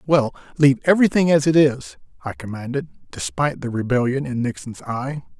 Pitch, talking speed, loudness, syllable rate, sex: 130 Hz, 155 wpm, -20 LUFS, 5.8 syllables/s, male